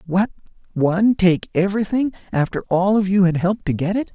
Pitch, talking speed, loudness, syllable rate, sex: 190 Hz, 175 wpm, -19 LUFS, 5.8 syllables/s, male